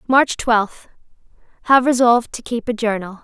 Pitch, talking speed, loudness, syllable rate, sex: 235 Hz, 130 wpm, -17 LUFS, 5.3 syllables/s, female